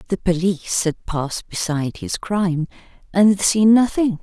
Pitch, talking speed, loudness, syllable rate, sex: 185 Hz, 155 wpm, -19 LUFS, 5.0 syllables/s, female